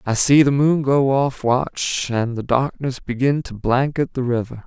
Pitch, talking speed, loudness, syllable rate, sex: 130 Hz, 195 wpm, -19 LUFS, 4.2 syllables/s, male